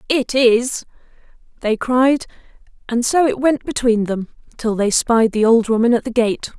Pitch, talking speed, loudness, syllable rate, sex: 235 Hz, 175 wpm, -17 LUFS, 4.5 syllables/s, female